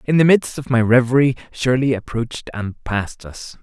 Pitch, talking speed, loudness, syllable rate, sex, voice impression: 125 Hz, 180 wpm, -18 LUFS, 5.1 syllables/s, male, masculine, adult-like, tensed, powerful, bright, clear, cool, intellectual, slightly refreshing, friendly, slightly reassuring, slightly wild, lively, kind